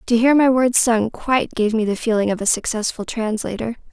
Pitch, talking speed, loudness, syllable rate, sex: 225 Hz, 215 wpm, -18 LUFS, 5.5 syllables/s, female